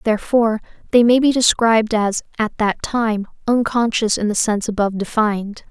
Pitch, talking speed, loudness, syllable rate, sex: 220 Hz, 160 wpm, -17 LUFS, 5.5 syllables/s, female